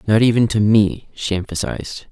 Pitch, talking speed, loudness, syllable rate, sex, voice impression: 105 Hz, 170 wpm, -18 LUFS, 5.2 syllables/s, male, masculine, adult-like, slightly refreshing, slightly sincere, kind